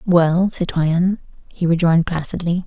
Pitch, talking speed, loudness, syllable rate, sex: 170 Hz, 115 wpm, -18 LUFS, 5.1 syllables/s, female